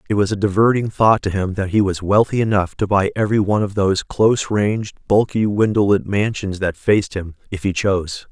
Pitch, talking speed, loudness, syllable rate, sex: 100 Hz, 215 wpm, -18 LUFS, 5.8 syllables/s, male